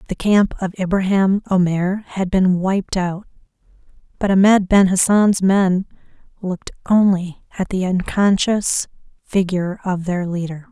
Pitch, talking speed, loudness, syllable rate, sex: 190 Hz, 130 wpm, -18 LUFS, 4.3 syllables/s, female